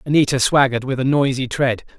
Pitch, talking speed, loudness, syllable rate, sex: 130 Hz, 180 wpm, -18 LUFS, 6.3 syllables/s, male